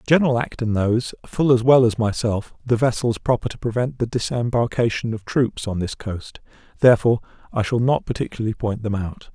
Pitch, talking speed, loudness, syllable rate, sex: 115 Hz, 180 wpm, -21 LUFS, 5.7 syllables/s, male